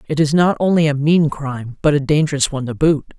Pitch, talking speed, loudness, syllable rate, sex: 150 Hz, 245 wpm, -16 LUFS, 6.3 syllables/s, female